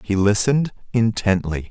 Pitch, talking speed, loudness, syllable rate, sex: 105 Hz, 105 wpm, -20 LUFS, 4.9 syllables/s, male